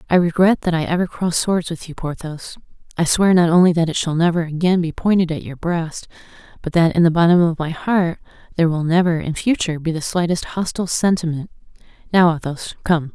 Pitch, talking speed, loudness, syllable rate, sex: 170 Hz, 205 wpm, -18 LUFS, 5.9 syllables/s, female